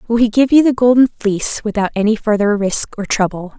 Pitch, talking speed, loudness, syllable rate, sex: 220 Hz, 220 wpm, -15 LUFS, 5.7 syllables/s, female